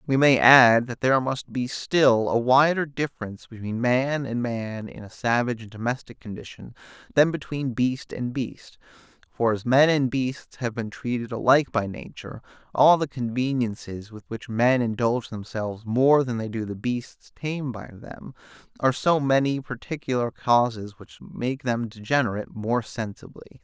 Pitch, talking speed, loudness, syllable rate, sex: 125 Hz, 165 wpm, -24 LUFS, 4.8 syllables/s, male